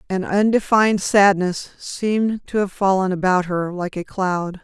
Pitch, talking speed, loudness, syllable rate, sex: 190 Hz, 155 wpm, -19 LUFS, 4.4 syllables/s, female